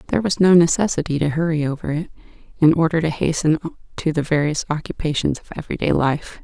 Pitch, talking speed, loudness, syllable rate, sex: 160 Hz, 185 wpm, -19 LUFS, 6.2 syllables/s, female